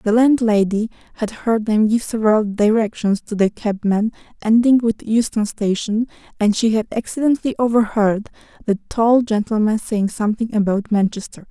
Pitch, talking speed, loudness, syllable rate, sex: 220 Hz, 140 wpm, -18 LUFS, 4.9 syllables/s, female